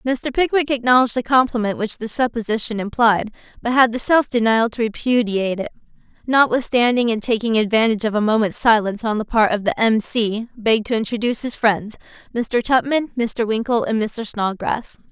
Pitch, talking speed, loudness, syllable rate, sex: 230 Hz, 175 wpm, -18 LUFS, 5.6 syllables/s, female